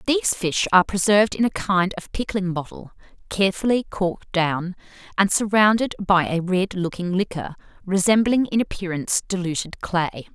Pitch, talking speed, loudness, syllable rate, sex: 190 Hz, 145 wpm, -21 LUFS, 5.2 syllables/s, female